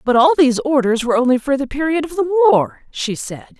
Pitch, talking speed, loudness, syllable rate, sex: 275 Hz, 235 wpm, -16 LUFS, 6.1 syllables/s, female